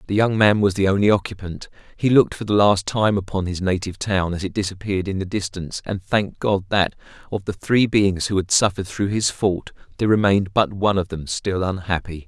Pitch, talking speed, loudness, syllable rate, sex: 95 Hz, 220 wpm, -20 LUFS, 5.9 syllables/s, male